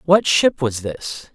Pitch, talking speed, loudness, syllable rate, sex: 145 Hz, 180 wpm, -18 LUFS, 3.3 syllables/s, male